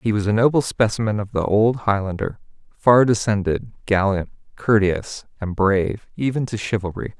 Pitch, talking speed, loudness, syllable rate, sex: 105 Hz, 150 wpm, -20 LUFS, 5.0 syllables/s, male